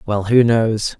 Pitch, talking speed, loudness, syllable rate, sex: 110 Hz, 180 wpm, -15 LUFS, 3.5 syllables/s, male